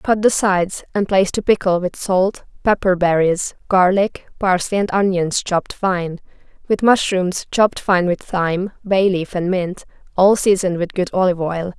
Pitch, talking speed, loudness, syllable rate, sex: 185 Hz, 170 wpm, -18 LUFS, 4.8 syllables/s, female